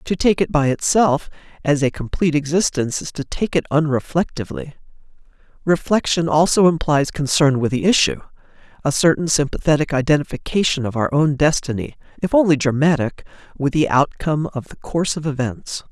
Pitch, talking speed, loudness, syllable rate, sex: 150 Hz, 145 wpm, -18 LUFS, 5.8 syllables/s, male